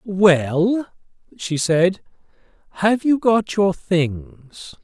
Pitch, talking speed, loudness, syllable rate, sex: 185 Hz, 100 wpm, -18 LUFS, 2.3 syllables/s, male